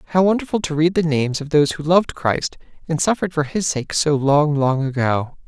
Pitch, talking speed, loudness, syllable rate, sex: 155 Hz, 220 wpm, -19 LUFS, 5.8 syllables/s, male